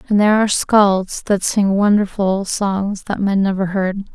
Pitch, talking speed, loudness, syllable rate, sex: 195 Hz, 175 wpm, -17 LUFS, 4.3 syllables/s, female